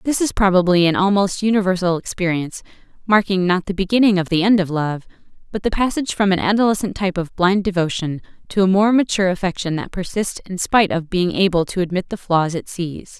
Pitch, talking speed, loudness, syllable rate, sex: 185 Hz, 200 wpm, -18 LUFS, 6.1 syllables/s, female